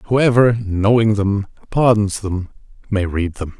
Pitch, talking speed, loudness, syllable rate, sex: 105 Hz, 135 wpm, -17 LUFS, 3.8 syllables/s, male